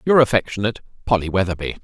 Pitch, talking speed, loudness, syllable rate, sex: 105 Hz, 130 wpm, -20 LUFS, 7.5 syllables/s, male